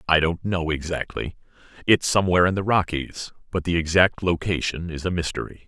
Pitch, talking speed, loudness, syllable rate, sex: 85 Hz, 160 wpm, -23 LUFS, 5.6 syllables/s, male